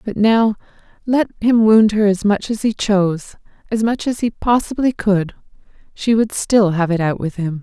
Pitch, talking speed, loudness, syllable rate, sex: 205 Hz, 195 wpm, -16 LUFS, 4.7 syllables/s, female